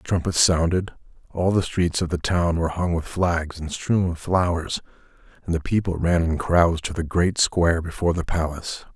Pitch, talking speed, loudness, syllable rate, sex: 85 Hz, 200 wpm, -22 LUFS, 5.1 syllables/s, male